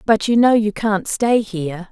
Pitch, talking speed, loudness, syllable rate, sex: 210 Hz, 220 wpm, -17 LUFS, 4.4 syllables/s, female